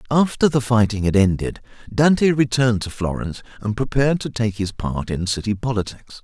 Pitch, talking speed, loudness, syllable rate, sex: 115 Hz, 175 wpm, -20 LUFS, 5.6 syllables/s, male